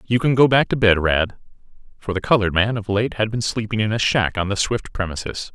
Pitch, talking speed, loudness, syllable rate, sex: 105 Hz, 250 wpm, -20 LUFS, 5.8 syllables/s, male